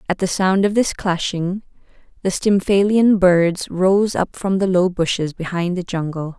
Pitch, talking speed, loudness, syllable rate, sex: 185 Hz, 170 wpm, -18 LUFS, 4.3 syllables/s, female